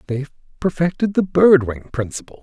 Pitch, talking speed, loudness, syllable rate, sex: 145 Hz, 150 wpm, -18 LUFS, 5.7 syllables/s, male